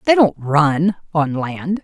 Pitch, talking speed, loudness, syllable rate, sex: 165 Hz, 165 wpm, -17 LUFS, 3.3 syllables/s, female